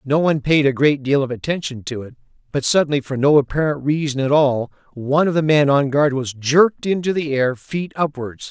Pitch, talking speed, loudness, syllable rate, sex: 145 Hz, 220 wpm, -18 LUFS, 5.5 syllables/s, male